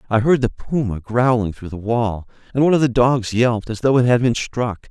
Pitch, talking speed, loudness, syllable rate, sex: 120 Hz, 245 wpm, -18 LUFS, 5.4 syllables/s, male